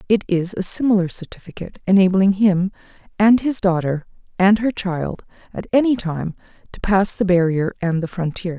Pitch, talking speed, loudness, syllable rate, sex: 190 Hz, 160 wpm, -18 LUFS, 5.1 syllables/s, female